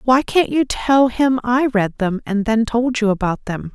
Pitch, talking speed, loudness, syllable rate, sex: 235 Hz, 225 wpm, -17 LUFS, 4.2 syllables/s, female